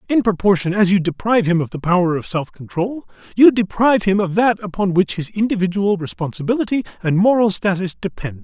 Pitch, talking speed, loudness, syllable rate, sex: 195 Hz, 185 wpm, -18 LUFS, 5.9 syllables/s, male